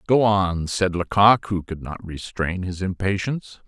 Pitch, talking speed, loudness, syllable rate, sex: 95 Hz, 165 wpm, -22 LUFS, 4.4 syllables/s, male